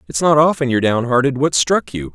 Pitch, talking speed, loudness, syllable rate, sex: 135 Hz, 225 wpm, -15 LUFS, 6.0 syllables/s, male